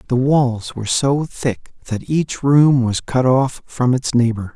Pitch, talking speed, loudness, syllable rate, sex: 125 Hz, 185 wpm, -17 LUFS, 3.9 syllables/s, male